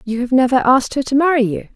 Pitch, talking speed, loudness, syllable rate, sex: 255 Hz, 275 wpm, -15 LUFS, 6.8 syllables/s, female